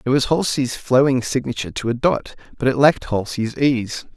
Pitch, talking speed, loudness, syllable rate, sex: 130 Hz, 190 wpm, -19 LUFS, 5.4 syllables/s, male